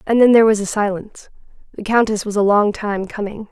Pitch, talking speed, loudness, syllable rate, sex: 210 Hz, 220 wpm, -16 LUFS, 6.1 syllables/s, female